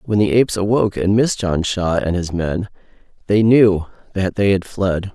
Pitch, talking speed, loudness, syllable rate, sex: 100 Hz, 185 wpm, -17 LUFS, 4.8 syllables/s, male